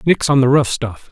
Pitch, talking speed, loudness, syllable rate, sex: 135 Hz, 270 wpm, -15 LUFS, 5.1 syllables/s, male